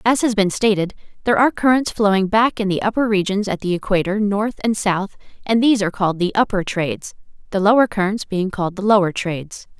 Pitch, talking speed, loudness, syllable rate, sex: 200 Hz, 200 wpm, -18 LUFS, 6.1 syllables/s, female